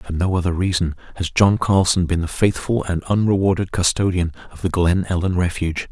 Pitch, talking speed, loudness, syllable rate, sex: 90 Hz, 185 wpm, -19 LUFS, 5.5 syllables/s, male